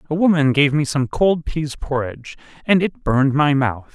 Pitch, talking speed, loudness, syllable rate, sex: 145 Hz, 200 wpm, -18 LUFS, 5.2 syllables/s, male